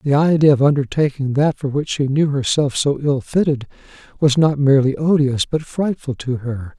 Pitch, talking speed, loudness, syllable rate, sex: 140 Hz, 185 wpm, -17 LUFS, 5.0 syllables/s, male